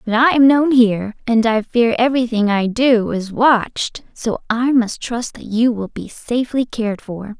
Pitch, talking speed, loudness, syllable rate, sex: 230 Hz, 195 wpm, -17 LUFS, 4.6 syllables/s, female